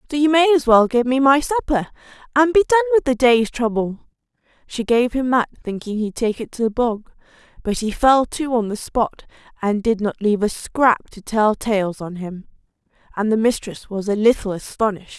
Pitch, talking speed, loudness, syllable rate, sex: 240 Hz, 205 wpm, -19 LUFS, 5.1 syllables/s, female